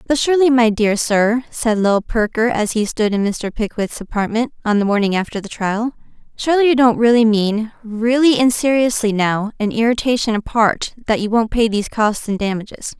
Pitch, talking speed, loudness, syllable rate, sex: 225 Hz, 180 wpm, -17 LUFS, 5.3 syllables/s, female